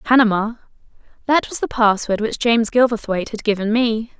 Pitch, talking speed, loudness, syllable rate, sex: 225 Hz, 145 wpm, -18 LUFS, 5.8 syllables/s, female